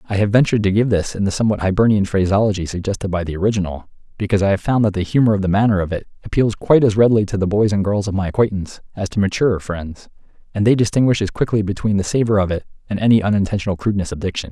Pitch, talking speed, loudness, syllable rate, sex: 100 Hz, 245 wpm, -18 LUFS, 7.7 syllables/s, male